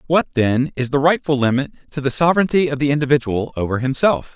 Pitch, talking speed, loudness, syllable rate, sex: 140 Hz, 195 wpm, -18 LUFS, 6.1 syllables/s, male